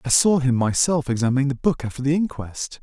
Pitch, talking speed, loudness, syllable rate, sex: 140 Hz, 210 wpm, -21 LUFS, 5.9 syllables/s, male